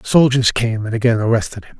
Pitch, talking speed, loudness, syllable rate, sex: 115 Hz, 200 wpm, -16 LUFS, 5.9 syllables/s, male